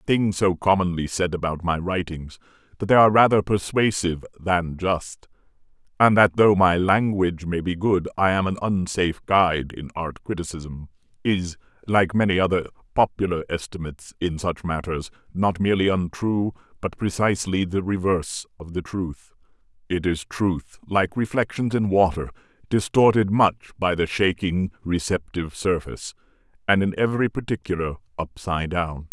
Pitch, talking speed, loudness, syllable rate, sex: 90 Hz, 145 wpm, -23 LUFS, 5.1 syllables/s, male